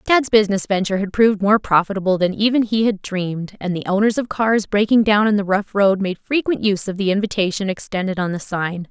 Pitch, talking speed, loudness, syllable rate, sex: 200 Hz, 220 wpm, -18 LUFS, 6.0 syllables/s, female